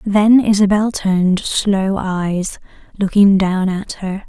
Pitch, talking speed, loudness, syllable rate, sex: 195 Hz, 125 wpm, -15 LUFS, 3.5 syllables/s, female